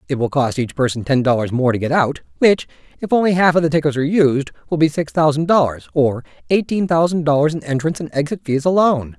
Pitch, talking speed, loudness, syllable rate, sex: 150 Hz, 220 wpm, -17 LUFS, 6.2 syllables/s, male